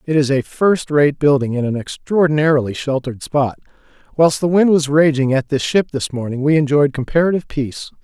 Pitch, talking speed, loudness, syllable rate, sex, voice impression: 145 Hz, 185 wpm, -16 LUFS, 5.7 syllables/s, male, masculine, middle-aged, thick, powerful, slightly hard, slightly muffled, cool, intellectual, sincere, calm, mature, friendly, reassuring, wild, slightly strict